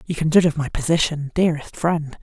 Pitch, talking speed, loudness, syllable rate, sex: 155 Hz, 215 wpm, -20 LUFS, 6.3 syllables/s, female